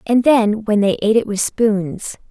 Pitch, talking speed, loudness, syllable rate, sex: 215 Hz, 210 wpm, -16 LUFS, 4.3 syllables/s, female